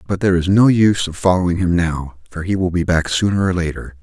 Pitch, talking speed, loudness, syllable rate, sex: 90 Hz, 255 wpm, -17 LUFS, 6.2 syllables/s, male